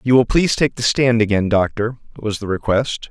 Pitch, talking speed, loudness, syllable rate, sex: 110 Hz, 215 wpm, -18 LUFS, 5.3 syllables/s, male